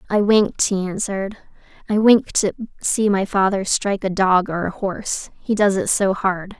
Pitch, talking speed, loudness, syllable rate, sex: 195 Hz, 190 wpm, -19 LUFS, 4.8 syllables/s, female